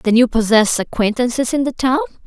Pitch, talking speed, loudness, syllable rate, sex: 245 Hz, 185 wpm, -16 LUFS, 5.7 syllables/s, female